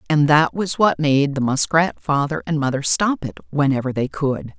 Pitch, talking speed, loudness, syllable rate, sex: 135 Hz, 195 wpm, -19 LUFS, 4.7 syllables/s, female